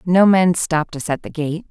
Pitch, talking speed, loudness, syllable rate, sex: 170 Hz, 245 wpm, -17 LUFS, 5.0 syllables/s, female